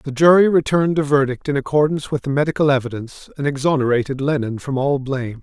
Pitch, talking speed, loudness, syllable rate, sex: 140 Hz, 190 wpm, -18 LUFS, 6.6 syllables/s, male